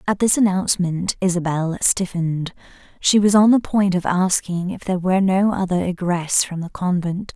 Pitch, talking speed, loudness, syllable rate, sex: 185 Hz, 170 wpm, -19 LUFS, 5.1 syllables/s, female